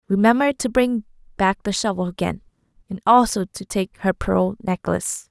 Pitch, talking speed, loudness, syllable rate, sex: 210 Hz, 160 wpm, -21 LUFS, 4.9 syllables/s, female